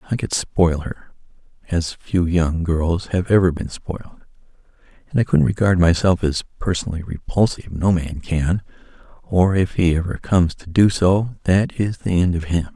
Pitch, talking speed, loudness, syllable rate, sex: 90 Hz, 175 wpm, -19 LUFS, 4.8 syllables/s, male